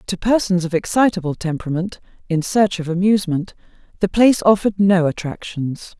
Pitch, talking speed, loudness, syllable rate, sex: 185 Hz, 140 wpm, -18 LUFS, 5.7 syllables/s, female